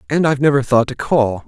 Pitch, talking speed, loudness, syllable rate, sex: 130 Hz, 245 wpm, -16 LUFS, 6.3 syllables/s, male